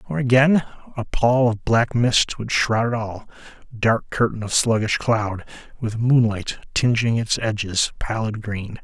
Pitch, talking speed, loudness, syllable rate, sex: 115 Hz, 155 wpm, -20 LUFS, 4.1 syllables/s, male